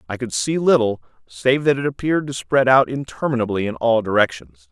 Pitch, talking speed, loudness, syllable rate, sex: 120 Hz, 190 wpm, -19 LUFS, 5.6 syllables/s, male